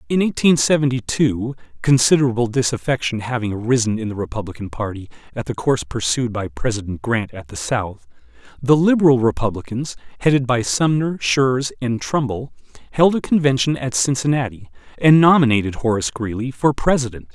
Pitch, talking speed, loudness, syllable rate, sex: 125 Hz, 145 wpm, -19 LUFS, 5.5 syllables/s, male